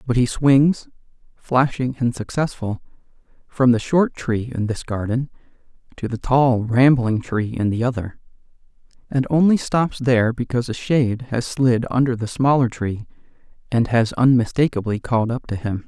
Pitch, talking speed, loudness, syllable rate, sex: 125 Hz, 155 wpm, -20 LUFS, 4.8 syllables/s, male